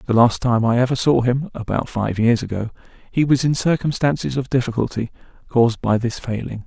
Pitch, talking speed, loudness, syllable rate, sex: 125 Hz, 190 wpm, -19 LUFS, 5.1 syllables/s, male